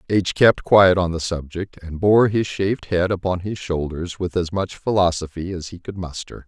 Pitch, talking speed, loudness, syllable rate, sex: 90 Hz, 205 wpm, -20 LUFS, 4.8 syllables/s, male